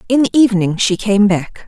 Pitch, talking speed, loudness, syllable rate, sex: 210 Hz, 215 wpm, -14 LUFS, 5.5 syllables/s, female